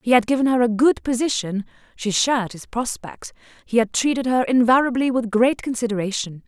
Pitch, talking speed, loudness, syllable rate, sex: 240 Hz, 160 wpm, -20 LUFS, 5.6 syllables/s, female